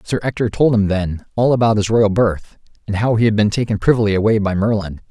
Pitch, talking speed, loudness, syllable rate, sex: 105 Hz, 235 wpm, -16 LUFS, 5.9 syllables/s, male